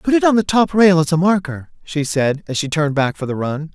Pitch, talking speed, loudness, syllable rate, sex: 165 Hz, 290 wpm, -17 LUFS, 5.7 syllables/s, male